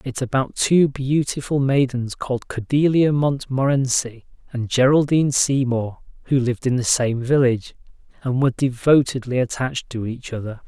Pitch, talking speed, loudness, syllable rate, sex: 130 Hz, 135 wpm, -20 LUFS, 5.0 syllables/s, male